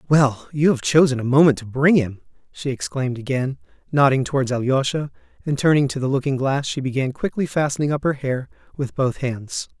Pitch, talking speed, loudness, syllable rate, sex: 135 Hz, 190 wpm, -20 LUFS, 5.6 syllables/s, male